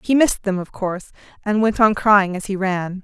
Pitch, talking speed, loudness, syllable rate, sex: 200 Hz, 235 wpm, -18 LUFS, 5.5 syllables/s, female